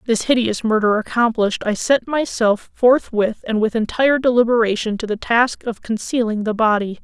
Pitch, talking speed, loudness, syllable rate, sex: 230 Hz, 160 wpm, -18 LUFS, 5.2 syllables/s, female